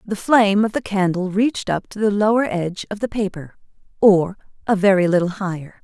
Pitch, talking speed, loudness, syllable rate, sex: 200 Hz, 195 wpm, -19 LUFS, 5.7 syllables/s, female